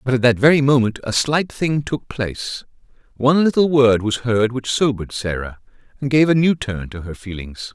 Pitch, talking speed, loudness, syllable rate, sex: 125 Hz, 200 wpm, -18 LUFS, 5.2 syllables/s, male